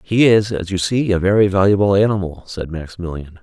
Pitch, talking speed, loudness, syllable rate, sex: 95 Hz, 195 wpm, -17 LUFS, 5.8 syllables/s, male